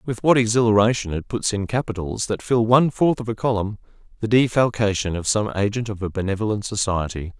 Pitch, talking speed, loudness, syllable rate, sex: 110 Hz, 185 wpm, -21 LUFS, 5.8 syllables/s, male